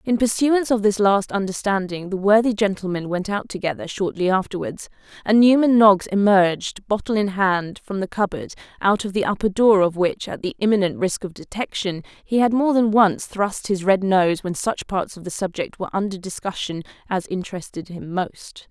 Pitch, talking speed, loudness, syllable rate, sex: 195 Hz, 190 wpm, -20 LUFS, 5.2 syllables/s, female